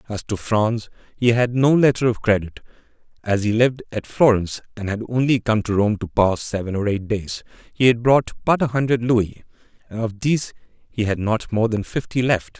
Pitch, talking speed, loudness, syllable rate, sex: 115 Hz, 205 wpm, -20 LUFS, 5.2 syllables/s, male